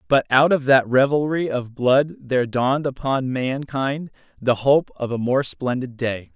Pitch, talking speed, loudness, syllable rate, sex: 135 Hz, 170 wpm, -20 LUFS, 4.3 syllables/s, male